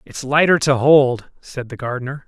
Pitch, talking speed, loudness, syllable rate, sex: 135 Hz, 185 wpm, -16 LUFS, 4.8 syllables/s, male